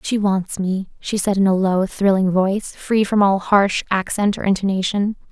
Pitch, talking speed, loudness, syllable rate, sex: 195 Hz, 190 wpm, -18 LUFS, 4.7 syllables/s, female